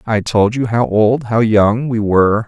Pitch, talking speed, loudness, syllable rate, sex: 110 Hz, 170 wpm, -14 LUFS, 4.3 syllables/s, male